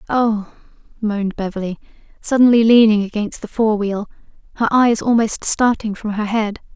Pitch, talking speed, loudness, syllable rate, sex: 215 Hz, 140 wpm, -17 LUFS, 5.0 syllables/s, female